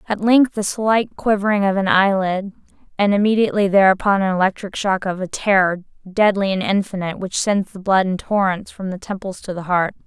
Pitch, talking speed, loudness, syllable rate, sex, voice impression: 195 Hz, 190 wpm, -18 LUFS, 5.7 syllables/s, female, feminine, adult-like, slightly cute, slightly intellectual, slightly friendly, slightly sweet